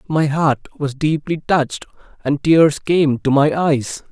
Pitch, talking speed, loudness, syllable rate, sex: 150 Hz, 160 wpm, -17 LUFS, 3.9 syllables/s, male